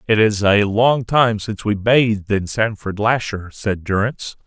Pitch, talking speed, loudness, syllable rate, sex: 105 Hz, 175 wpm, -18 LUFS, 4.5 syllables/s, male